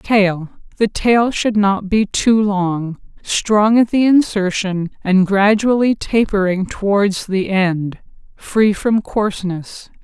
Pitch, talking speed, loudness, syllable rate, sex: 200 Hz, 120 wpm, -16 LUFS, 3.3 syllables/s, female